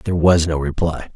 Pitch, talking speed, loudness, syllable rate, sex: 80 Hz, 210 wpm, -18 LUFS, 5.5 syllables/s, male